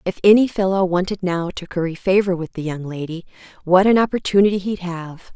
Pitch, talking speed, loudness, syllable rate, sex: 185 Hz, 190 wpm, -19 LUFS, 5.8 syllables/s, female